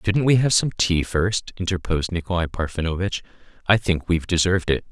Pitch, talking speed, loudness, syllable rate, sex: 90 Hz, 170 wpm, -22 LUFS, 6.0 syllables/s, male